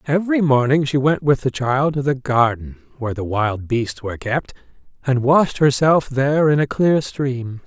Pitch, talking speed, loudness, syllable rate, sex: 135 Hz, 190 wpm, -18 LUFS, 4.8 syllables/s, male